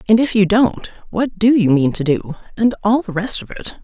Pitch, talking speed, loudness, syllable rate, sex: 200 Hz, 250 wpm, -16 LUFS, 5.1 syllables/s, female